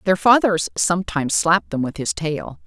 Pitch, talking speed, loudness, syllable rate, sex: 155 Hz, 180 wpm, -19 LUFS, 5.2 syllables/s, female